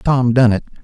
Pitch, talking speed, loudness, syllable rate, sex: 120 Hz, 215 wpm, -14 LUFS, 5.6 syllables/s, male